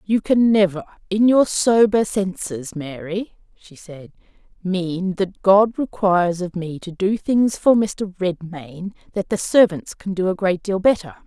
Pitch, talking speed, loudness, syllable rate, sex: 190 Hz, 165 wpm, -19 LUFS, 4.0 syllables/s, female